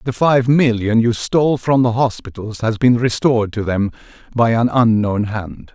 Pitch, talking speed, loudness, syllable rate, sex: 115 Hz, 175 wpm, -16 LUFS, 4.6 syllables/s, male